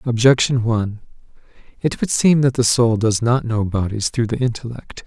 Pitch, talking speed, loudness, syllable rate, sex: 120 Hz, 180 wpm, -18 LUFS, 5.0 syllables/s, male